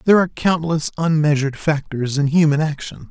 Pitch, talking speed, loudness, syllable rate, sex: 155 Hz, 155 wpm, -18 LUFS, 5.8 syllables/s, male